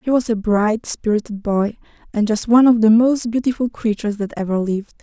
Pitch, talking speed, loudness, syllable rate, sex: 220 Hz, 205 wpm, -18 LUFS, 5.8 syllables/s, female